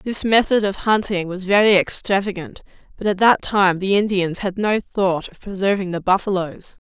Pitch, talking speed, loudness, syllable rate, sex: 195 Hz, 175 wpm, -19 LUFS, 4.9 syllables/s, female